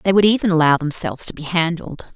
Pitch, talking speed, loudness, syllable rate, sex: 170 Hz, 225 wpm, -17 LUFS, 6.3 syllables/s, female